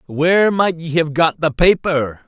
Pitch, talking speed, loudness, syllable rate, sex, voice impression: 160 Hz, 185 wpm, -16 LUFS, 4.3 syllables/s, male, masculine, middle-aged, slightly thick, sincere, slightly wild